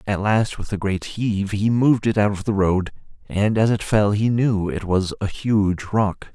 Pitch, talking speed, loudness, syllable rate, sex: 105 Hz, 225 wpm, -21 LUFS, 4.5 syllables/s, male